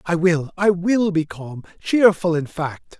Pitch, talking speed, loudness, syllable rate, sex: 175 Hz, 180 wpm, -19 LUFS, 3.8 syllables/s, male